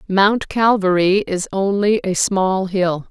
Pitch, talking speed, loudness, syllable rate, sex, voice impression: 195 Hz, 135 wpm, -17 LUFS, 3.5 syllables/s, female, very feminine, very middle-aged, slightly thin, tensed, powerful, slightly bright, slightly hard, very clear, fluent, cool, intellectual, refreshing, very sincere, very calm, slightly friendly, very reassuring, slightly unique, elegant, slightly wild, slightly sweet, slightly lively, kind, slightly sharp